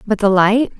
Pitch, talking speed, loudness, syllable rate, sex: 210 Hz, 225 wpm, -14 LUFS, 4.8 syllables/s, female